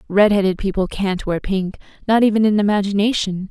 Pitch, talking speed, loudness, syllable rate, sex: 200 Hz, 155 wpm, -18 LUFS, 5.5 syllables/s, female